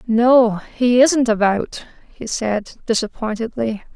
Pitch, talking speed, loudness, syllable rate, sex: 230 Hz, 105 wpm, -18 LUFS, 3.6 syllables/s, female